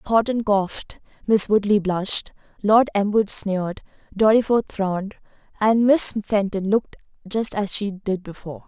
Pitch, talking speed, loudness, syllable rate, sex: 205 Hz, 105 wpm, -21 LUFS, 4.8 syllables/s, female